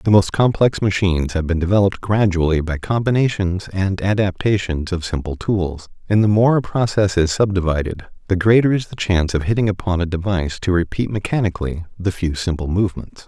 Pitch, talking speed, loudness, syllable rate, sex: 95 Hz, 175 wpm, -19 LUFS, 5.7 syllables/s, male